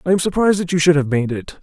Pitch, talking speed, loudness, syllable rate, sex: 165 Hz, 335 wpm, -17 LUFS, 7.4 syllables/s, male